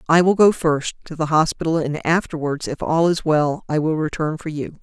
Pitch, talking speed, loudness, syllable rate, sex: 155 Hz, 225 wpm, -20 LUFS, 5.2 syllables/s, female